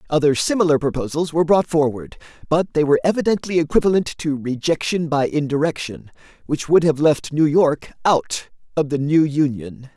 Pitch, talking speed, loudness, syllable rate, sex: 150 Hz, 155 wpm, -19 LUFS, 5.3 syllables/s, male